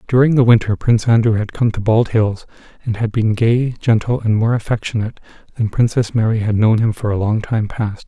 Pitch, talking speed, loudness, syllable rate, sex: 110 Hz, 215 wpm, -16 LUFS, 5.6 syllables/s, male